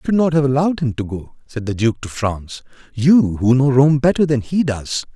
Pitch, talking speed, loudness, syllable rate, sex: 130 Hz, 245 wpm, -17 LUFS, 5.4 syllables/s, male